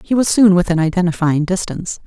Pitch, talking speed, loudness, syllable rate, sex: 180 Hz, 175 wpm, -15 LUFS, 6.3 syllables/s, female